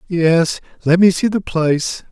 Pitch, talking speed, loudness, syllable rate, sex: 170 Hz, 170 wpm, -16 LUFS, 4.2 syllables/s, male